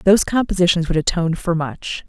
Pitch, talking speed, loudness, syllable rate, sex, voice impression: 175 Hz, 175 wpm, -18 LUFS, 5.9 syllables/s, female, very feminine, slightly old, slightly thin, slightly tensed, powerful, slightly dark, soft, clear, fluent, slightly raspy, slightly cool, very intellectual, slightly refreshing, very sincere, very calm, friendly, reassuring, unique, very elegant, sweet, lively, slightly strict, slightly intense, slightly sharp